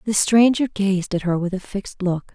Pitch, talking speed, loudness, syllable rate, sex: 195 Hz, 230 wpm, -20 LUFS, 5.0 syllables/s, female